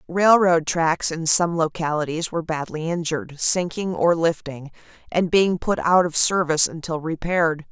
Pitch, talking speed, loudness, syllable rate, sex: 165 Hz, 150 wpm, -20 LUFS, 4.8 syllables/s, female